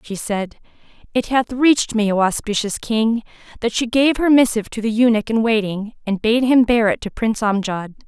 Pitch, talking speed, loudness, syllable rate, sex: 225 Hz, 200 wpm, -18 LUFS, 5.3 syllables/s, female